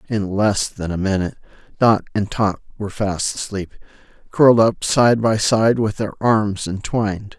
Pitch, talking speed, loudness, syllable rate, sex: 105 Hz, 165 wpm, -18 LUFS, 4.5 syllables/s, male